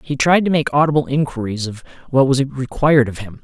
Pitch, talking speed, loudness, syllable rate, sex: 135 Hz, 210 wpm, -17 LUFS, 5.9 syllables/s, male